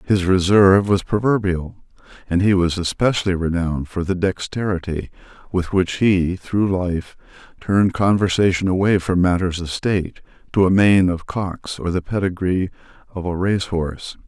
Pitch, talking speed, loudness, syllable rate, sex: 90 Hz, 145 wpm, -19 LUFS, 4.9 syllables/s, male